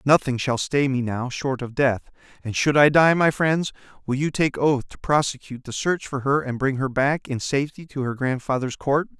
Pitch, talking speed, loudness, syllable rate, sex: 135 Hz, 220 wpm, -22 LUFS, 5.2 syllables/s, male